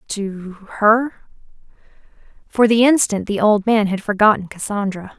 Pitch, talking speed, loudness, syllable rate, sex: 210 Hz, 115 wpm, -17 LUFS, 4.3 syllables/s, female